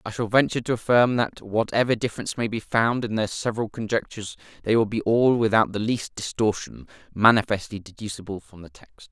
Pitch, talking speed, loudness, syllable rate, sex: 110 Hz, 185 wpm, -23 LUFS, 5.9 syllables/s, male